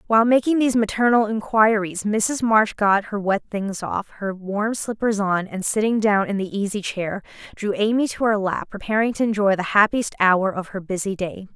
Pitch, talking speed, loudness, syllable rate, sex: 210 Hz, 195 wpm, -21 LUFS, 5.0 syllables/s, female